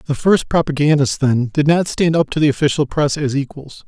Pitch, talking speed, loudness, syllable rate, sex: 145 Hz, 215 wpm, -16 LUFS, 5.4 syllables/s, male